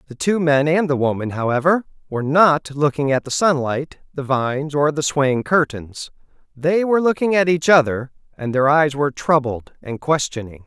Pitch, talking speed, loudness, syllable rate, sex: 145 Hz, 180 wpm, -18 LUFS, 5.0 syllables/s, male